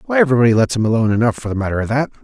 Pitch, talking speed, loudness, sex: 120 Hz, 295 wpm, -16 LUFS, male